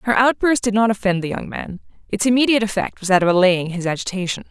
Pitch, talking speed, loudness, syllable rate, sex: 205 Hz, 225 wpm, -18 LUFS, 6.6 syllables/s, female